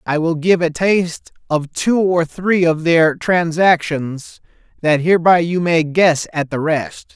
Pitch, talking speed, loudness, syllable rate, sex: 165 Hz, 170 wpm, -16 LUFS, 3.9 syllables/s, male